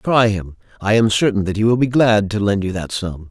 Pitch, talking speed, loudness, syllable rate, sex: 105 Hz, 270 wpm, -17 LUFS, 5.3 syllables/s, male